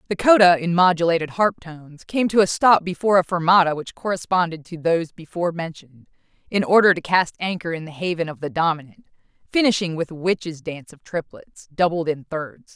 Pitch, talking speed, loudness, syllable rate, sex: 170 Hz, 190 wpm, -20 LUFS, 5.9 syllables/s, female